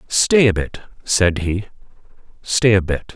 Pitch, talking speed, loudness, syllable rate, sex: 100 Hz, 150 wpm, -17 LUFS, 3.8 syllables/s, male